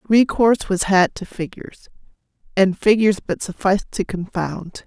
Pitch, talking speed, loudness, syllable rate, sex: 195 Hz, 135 wpm, -19 LUFS, 5.0 syllables/s, female